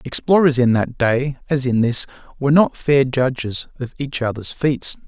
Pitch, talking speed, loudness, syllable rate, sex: 130 Hz, 175 wpm, -18 LUFS, 4.6 syllables/s, male